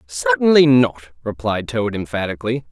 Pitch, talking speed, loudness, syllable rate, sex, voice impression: 110 Hz, 110 wpm, -17 LUFS, 4.9 syllables/s, male, very masculine, slightly young, adult-like, slightly thick, slightly tensed, slightly powerful, bright, very hard, clear, fluent, cool, slightly intellectual, very refreshing, very sincere, slightly calm, friendly, very reassuring, slightly unique, wild, sweet, very lively, very kind